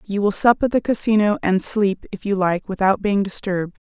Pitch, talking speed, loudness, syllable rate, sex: 200 Hz, 215 wpm, -19 LUFS, 5.3 syllables/s, female